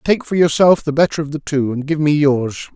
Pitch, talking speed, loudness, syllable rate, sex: 150 Hz, 260 wpm, -16 LUFS, 5.2 syllables/s, male